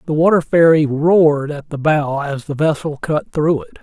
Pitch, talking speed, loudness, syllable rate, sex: 150 Hz, 205 wpm, -16 LUFS, 4.8 syllables/s, male